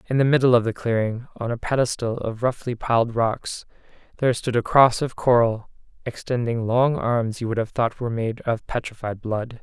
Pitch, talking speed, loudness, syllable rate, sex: 120 Hz, 195 wpm, -22 LUFS, 5.2 syllables/s, male